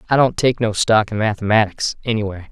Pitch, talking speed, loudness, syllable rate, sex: 110 Hz, 190 wpm, -18 LUFS, 5.9 syllables/s, male